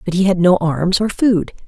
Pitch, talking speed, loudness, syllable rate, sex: 185 Hz, 250 wpm, -15 LUFS, 4.9 syllables/s, female